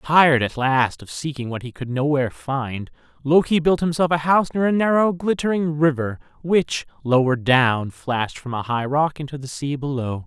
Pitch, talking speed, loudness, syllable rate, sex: 140 Hz, 185 wpm, -21 LUFS, 5.0 syllables/s, male